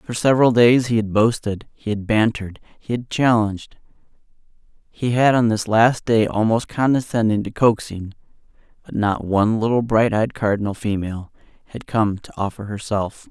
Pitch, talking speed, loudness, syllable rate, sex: 110 Hz, 160 wpm, -19 LUFS, 5.2 syllables/s, male